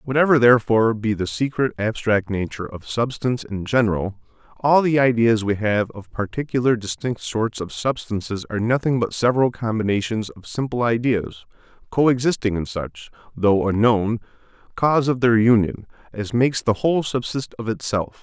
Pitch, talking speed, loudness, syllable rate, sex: 115 Hz, 155 wpm, -21 LUFS, 5.3 syllables/s, male